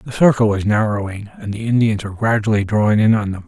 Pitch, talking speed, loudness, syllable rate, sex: 110 Hz, 225 wpm, -17 LUFS, 6.2 syllables/s, male